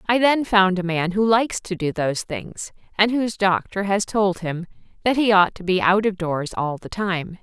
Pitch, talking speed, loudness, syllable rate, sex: 195 Hz, 225 wpm, -21 LUFS, 4.9 syllables/s, female